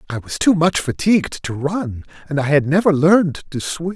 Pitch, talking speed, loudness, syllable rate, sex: 160 Hz, 210 wpm, -18 LUFS, 5.2 syllables/s, male